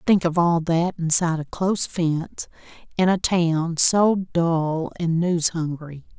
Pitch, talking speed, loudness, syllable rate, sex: 170 Hz, 155 wpm, -21 LUFS, 3.9 syllables/s, female